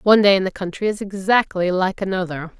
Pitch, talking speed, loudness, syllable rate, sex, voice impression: 190 Hz, 210 wpm, -19 LUFS, 6.1 syllables/s, female, slightly feminine, slightly adult-like, slightly fluent, calm, slightly unique